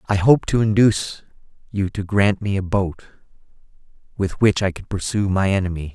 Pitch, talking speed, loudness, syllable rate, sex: 100 Hz, 170 wpm, -20 LUFS, 5.4 syllables/s, male